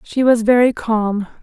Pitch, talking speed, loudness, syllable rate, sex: 225 Hz, 170 wpm, -15 LUFS, 4.1 syllables/s, female